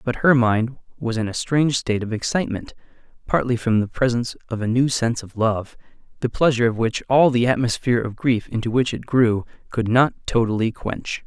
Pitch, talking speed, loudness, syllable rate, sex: 120 Hz, 195 wpm, -21 LUFS, 5.7 syllables/s, male